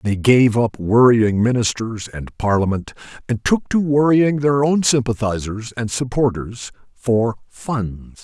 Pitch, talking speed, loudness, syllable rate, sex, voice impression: 120 Hz, 125 wpm, -18 LUFS, 4.0 syllables/s, male, masculine, adult-like, cool, slightly intellectual, slightly calm